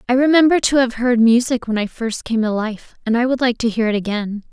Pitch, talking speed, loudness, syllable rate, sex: 235 Hz, 265 wpm, -17 LUFS, 5.7 syllables/s, female